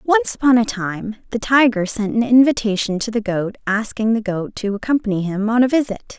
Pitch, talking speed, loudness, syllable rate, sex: 225 Hz, 205 wpm, -18 LUFS, 5.3 syllables/s, female